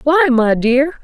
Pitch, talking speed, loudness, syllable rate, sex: 265 Hz, 175 wpm, -13 LUFS, 3.3 syllables/s, female